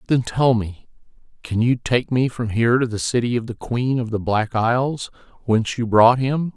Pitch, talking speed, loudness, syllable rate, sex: 120 Hz, 210 wpm, -20 LUFS, 5.0 syllables/s, male